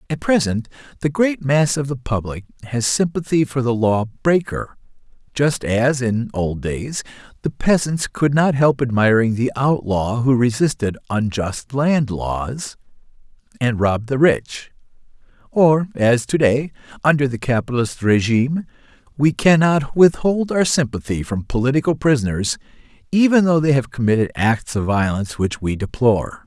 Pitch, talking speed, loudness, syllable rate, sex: 130 Hz, 145 wpm, -18 LUFS, 4.6 syllables/s, male